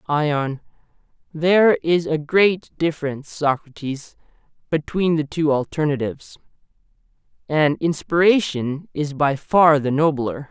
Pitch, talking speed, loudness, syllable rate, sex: 155 Hz, 105 wpm, -20 LUFS, 4.2 syllables/s, male